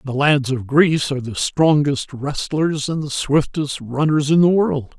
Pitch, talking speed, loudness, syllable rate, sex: 145 Hz, 180 wpm, -18 LUFS, 4.3 syllables/s, male